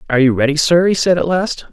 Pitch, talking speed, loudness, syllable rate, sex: 160 Hz, 280 wpm, -14 LUFS, 6.8 syllables/s, male